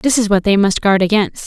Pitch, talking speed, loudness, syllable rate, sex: 200 Hz, 285 wpm, -14 LUFS, 5.6 syllables/s, female